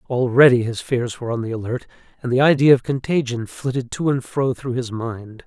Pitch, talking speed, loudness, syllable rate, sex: 125 Hz, 210 wpm, -20 LUFS, 5.4 syllables/s, male